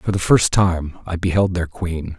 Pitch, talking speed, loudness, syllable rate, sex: 90 Hz, 220 wpm, -19 LUFS, 4.3 syllables/s, male